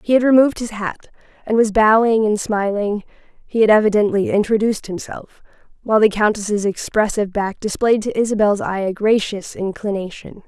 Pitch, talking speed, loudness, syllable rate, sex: 210 Hz, 155 wpm, -18 LUFS, 5.5 syllables/s, female